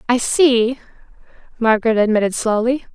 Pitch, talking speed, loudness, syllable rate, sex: 235 Hz, 100 wpm, -16 LUFS, 5.2 syllables/s, female